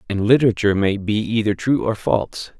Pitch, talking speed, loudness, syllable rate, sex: 105 Hz, 185 wpm, -19 LUFS, 5.9 syllables/s, male